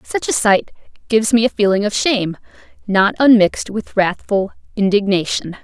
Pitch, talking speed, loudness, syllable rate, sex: 210 Hz, 150 wpm, -16 LUFS, 5.2 syllables/s, female